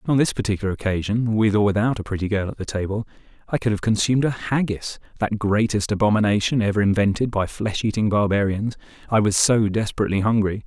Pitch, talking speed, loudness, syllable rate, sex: 105 Hz, 175 wpm, -21 LUFS, 6.2 syllables/s, male